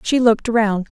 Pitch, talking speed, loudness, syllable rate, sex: 220 Hz, 185 wpm, -17 LUFS, 6.1 syllables/s, female